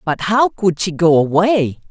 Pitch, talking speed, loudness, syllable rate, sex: 185 Hz, 190 wpm, -15 LUFS, 4.1 syllables/s, female